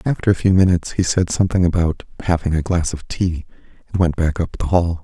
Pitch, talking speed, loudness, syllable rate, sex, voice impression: 85 Hz, 225 wpm, -19 LUFS, 6.0 syllables/s, male, very masculine, very middle-aged, very thick, very relaxed, very weak, very dark, very soft, very muffled, fluent, slightly raspy, very cool, very intellectual, very sincere, very calm, very mature, friendly, reassuring, very unique, elegant, slightly wild, very sweet, slightly lively, very kind, very modest